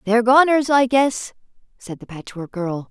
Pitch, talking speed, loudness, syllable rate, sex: 230 Hz, 165 wpm, -17 LUFS, 4.7 syllables/s, female